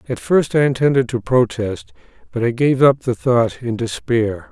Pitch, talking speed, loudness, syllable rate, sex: 125 Hz, 185 wpm, -17 LUFS, 4.5 syllables/s, male